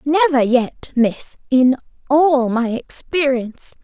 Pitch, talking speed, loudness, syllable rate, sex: 265 Hz, 110 wpm, -17 LUFS, 3.5 syllables/s, female